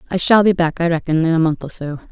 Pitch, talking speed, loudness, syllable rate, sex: 170 Hz, 310 wpm, -16 LUFS, 6.6 syllables/s, female